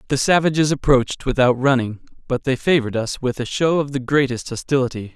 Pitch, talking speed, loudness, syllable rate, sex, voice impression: 135 Hz, 185 wpm, -19 LUFS, 6.0 syllables/s, male, masculine, adult-like, slightly clear, slightly refreshing, sincere, slightly calm